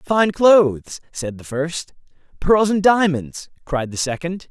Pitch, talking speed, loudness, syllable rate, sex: 165 Hz, 145 wpm, -18 LUFS, 3.7 syllables/s, male